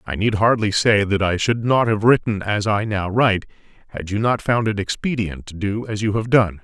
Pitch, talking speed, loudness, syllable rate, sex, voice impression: 105 Hz, 235 wpm, -19 LUFS, 5.2 syllables/s, male, very masculine, very adult-like, slightly thick, slightly muffled, fluent, cool, slightly intellectual, slightly wild